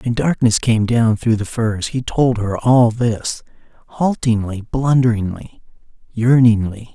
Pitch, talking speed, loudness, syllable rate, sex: 115 Hz, 130 wpm, -17 LUFS, 4.0 syllables/s, male